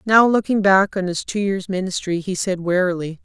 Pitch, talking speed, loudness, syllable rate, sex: 190 Hz, 205 wpm, -19 LUFS, 5.1 syllables/s, female